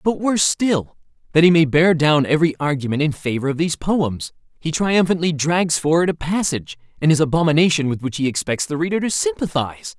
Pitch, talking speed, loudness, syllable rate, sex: 155 Hz, 190 wpm, -18 LUFS, 5.9 syllables/s, male